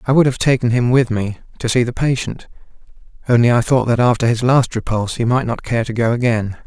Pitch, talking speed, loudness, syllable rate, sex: 120 Hz, 235 wpm, -17 LUFS, 6.0 syllables/s, male